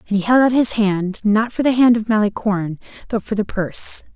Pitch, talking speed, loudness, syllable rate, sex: 215 Hz, 230 wpm, -17 LUFS, 5.6 syllables/s, female